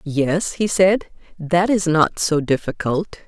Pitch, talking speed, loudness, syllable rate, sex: 170 Hz, 145 wpm, -19 LUFS, 3.5 syllables/s, female